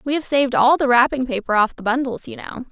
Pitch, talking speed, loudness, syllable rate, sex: 255 Hz, 265 wpm, -18 LUFS, 6.2 syllables/s, female